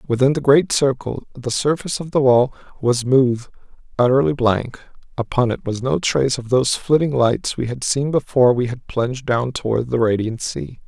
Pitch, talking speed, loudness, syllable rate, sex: 125 Hz, 190 wpm, -19 LUFS, 5.0 syllables/s, male